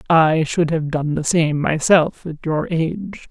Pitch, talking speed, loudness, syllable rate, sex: 160 Hz, 180 wpm, -18 LUFS, 4.0 syllables/s, female